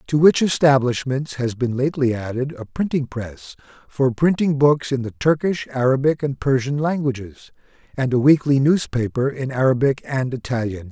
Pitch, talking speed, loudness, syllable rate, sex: 135 Hz, 155 wpm, -20 LUFS, 4.9 syllables/s, male